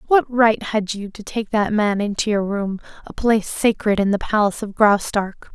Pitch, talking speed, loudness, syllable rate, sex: 210 Hz, 205 wpm, -19 LUFS, 4.9 syllables/s, female